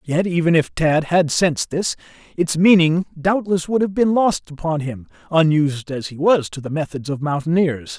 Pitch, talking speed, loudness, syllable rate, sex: 165 Hz, 190 wpm, -19 LUFS, 4.9 syllables/s, male